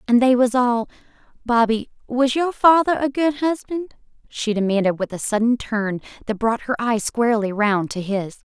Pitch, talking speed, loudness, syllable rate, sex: 240 Hz, 175 wpm, -20 LUFS, 4.8 syllables/s, female